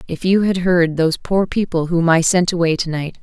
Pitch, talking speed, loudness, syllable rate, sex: 175 Hz, 225 wpm, -17 LUFS, 5.2 syllables/s, female